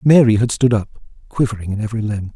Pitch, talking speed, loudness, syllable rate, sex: 115 Hz, 205 wpm, -17 LUFS, 6.5 syllables/s, male